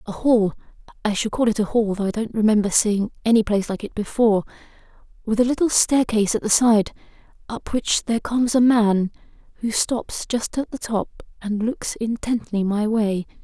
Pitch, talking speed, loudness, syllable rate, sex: 220 Hz, 185 wpm, -21 LUFS, 8.7 syllables/s, female